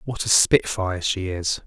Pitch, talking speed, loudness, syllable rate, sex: 95 Hz, 180 wpm, -21 LUFS, 4.6 syllables/s, male